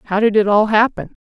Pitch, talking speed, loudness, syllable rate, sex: 210 Hz, 245 wpm, -15 LUFS, 5.3 syllables/s, female